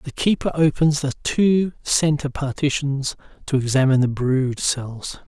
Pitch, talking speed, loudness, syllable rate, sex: 140 Hz, 135 wpm, -20 LUFS, 4.3 syllables/s, male